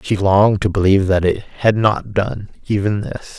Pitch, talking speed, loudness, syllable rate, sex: 100 Hz, 195 wpm, -16 LUFS, 4.8 syllables/s, male